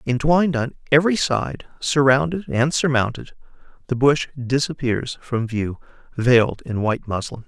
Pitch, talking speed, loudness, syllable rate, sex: 130 Hz, 130 wpm, -20 LUFS, 4.8 syllables/s, male